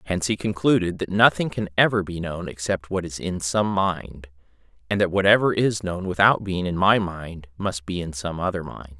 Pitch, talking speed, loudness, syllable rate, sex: 90 Hz, 205 wpm, -22 LUFS, 5.0 syllables/s, male